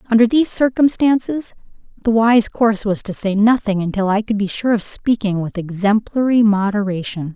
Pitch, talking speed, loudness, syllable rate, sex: 215 Hz, 165 wpm, -17 LUFS, 5.2 syllables/s, female